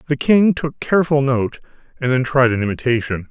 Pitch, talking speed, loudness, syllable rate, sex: 135 Hz, 180 wpm, -17 LUFS, 5.6 syllables/s, male